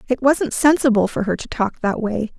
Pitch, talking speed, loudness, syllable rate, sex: 240 Hz, 225 wpm, -19 LUFS, 5.1 syllables/s, female